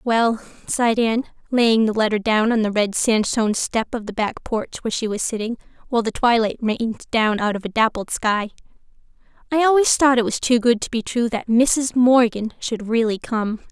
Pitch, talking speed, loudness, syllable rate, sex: 230 Hz, 200 wpm, -20 LUFS, 5.2 syllables/s, female